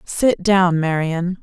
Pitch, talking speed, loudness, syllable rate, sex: 180 Hz, 125 wpm, -17 LUFS, 3.1 syllables/s, female